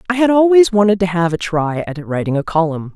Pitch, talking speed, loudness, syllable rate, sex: 190 Hz, 245 wpm, -15 LUFS, 5.8 syllables/s, female